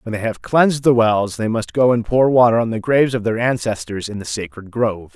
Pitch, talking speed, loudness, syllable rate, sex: 115 Hz, 255 wpm, -17 LUFS, 5.7 syllables/s, male